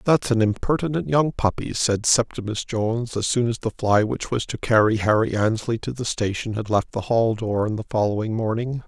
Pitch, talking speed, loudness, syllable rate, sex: 115 Hz, 210 wpm, -22 LUFS, 5.3 syllables/s, male